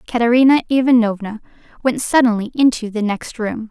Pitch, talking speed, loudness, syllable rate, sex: 230 Hz, 130 wpm, -16 LUFS, 5.6 syllables/s, female